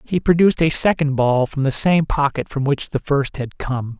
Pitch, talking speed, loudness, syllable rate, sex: 140 Hz, 225 wpm, -18 LUFS, 4.9 syllables/s, male